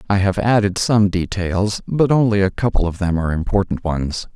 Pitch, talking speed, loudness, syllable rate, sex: 100 Hz, 195 wpm, -18 LUFS, 5.2 syllables/s, male